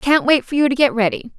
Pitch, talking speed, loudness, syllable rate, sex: 265 Hz, 300 wpm, -16 LUFS, 6.1 syllables/s, female